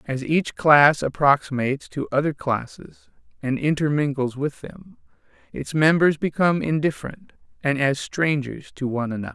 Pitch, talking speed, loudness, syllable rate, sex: 145 Hz, 135 wpm, -21 LUFS, 4.9 syllables/s, male